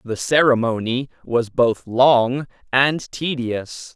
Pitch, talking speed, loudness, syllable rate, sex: 125 Hz, 105 wpm, -19 LUFS, 3.2 syllables/s, male